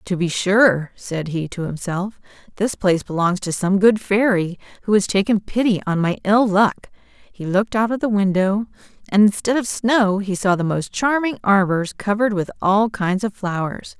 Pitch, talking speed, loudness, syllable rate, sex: 200 Hz, 190 wpm, -19 LUFS, 4.8 syllables/s, female